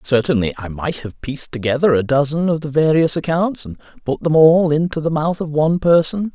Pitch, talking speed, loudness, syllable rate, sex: 150 Hz, 210 wpm, -17 LUFS, 5.6 syllables/s, male